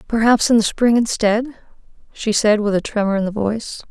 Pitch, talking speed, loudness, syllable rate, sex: 220 Hz, 200 wpm, -17 LUFS, 5.5 syllables/s, female